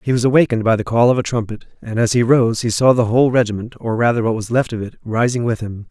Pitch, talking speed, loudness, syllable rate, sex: 115 Hz, 285 wpm, -17 LUFS, 6.6 syllables/s, male